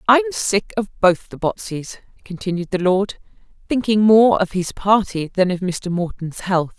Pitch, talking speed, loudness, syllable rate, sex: 195 Hz, 170 wpm, -19 LUFS, 4.4 syllables/s, female